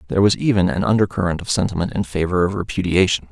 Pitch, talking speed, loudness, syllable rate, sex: 95 Hz, 200 wpm, -19 LUFS, 7.1 syllables/s, male